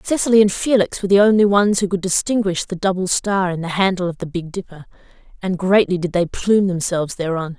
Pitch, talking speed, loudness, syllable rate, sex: 185 Hz, 215 wpm, -18 LUFS, 6.0 syllables/s, female